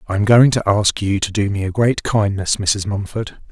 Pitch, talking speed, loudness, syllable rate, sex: 105 Hz, 240 wpm, -17 LUFS, 5.0 syllables/s, male